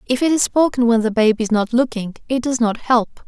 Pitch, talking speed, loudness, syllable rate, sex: 235 Hz, 255 wpm, -17 LUFS, 5.9 syllables/s, female